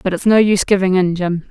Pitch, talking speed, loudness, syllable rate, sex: 185 Hz, 280 wpm, -15 LUFS, 6.2 syllables/s, female